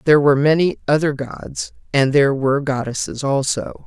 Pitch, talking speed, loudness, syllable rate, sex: 140 Hz, 155 wpm, -18 LUFS, 5.5 syllables/s, female